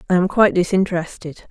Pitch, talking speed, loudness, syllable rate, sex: 180 Hz, 160 wpm, -17 LUFS, 6.9 syllables/s, female